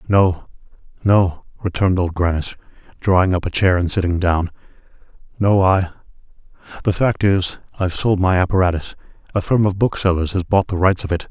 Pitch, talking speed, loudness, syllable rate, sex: 90 Hz, 160 wpm, -18 LUFS, 5.5 syllables/s, male